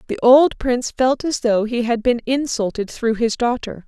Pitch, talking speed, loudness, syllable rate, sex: 245 Hz, 200 wpm, -18 LUFS, 4.8 syllables/s, female